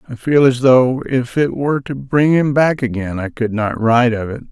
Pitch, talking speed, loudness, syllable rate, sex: 125 Hz, 240 wpm, -15 LUFS, 5.1 syllables/s, male